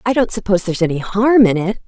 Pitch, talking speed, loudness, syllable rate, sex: 205 Hz, 255 wpm, -15 LUFS, 6.9 syllables/s, female